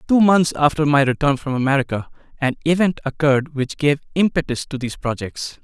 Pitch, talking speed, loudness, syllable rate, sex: 145 Hz, 170 wpm, -19 LUFS, 5.7 syllables/s, male